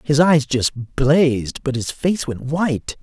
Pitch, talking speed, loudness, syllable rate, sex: 140 Hz, 180 wpm, -19 LUFS, 3.8 syllables/s, male